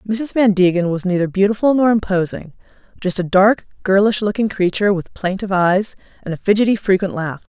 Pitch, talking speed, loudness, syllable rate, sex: 195 Hz, 175 wpm, -17 LUFS, 5.8 syllables/s, female